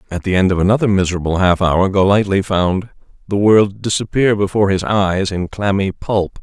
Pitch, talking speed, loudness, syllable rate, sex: 100 Hz, 180 wpm, -15 LUFS, 5.3 syllables/s, male